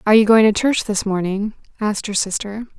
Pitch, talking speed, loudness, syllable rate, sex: 210 Hz, 215 wpm, -18 LUFS, 6.1 syllables/s, female